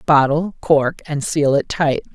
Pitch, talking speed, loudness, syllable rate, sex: 150 Hz, 170 wpm, -18 LUFS, 4.0 syllables/s, female